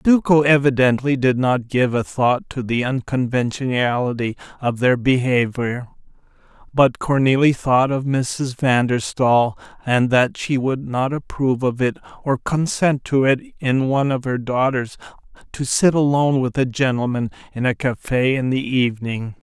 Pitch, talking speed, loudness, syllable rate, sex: 130 Hz, 155 wpm, -19 LUFS, 4.6 syllables/s, male